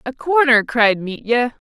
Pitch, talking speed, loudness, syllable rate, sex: 245 Hz, 145 wpm, -16 LUFS, 4.0 syllables/s, female